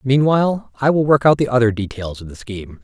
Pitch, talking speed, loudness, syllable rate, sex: 125 Hz, 230 wpm, -16 LUFS, 6.0 syllables/s, male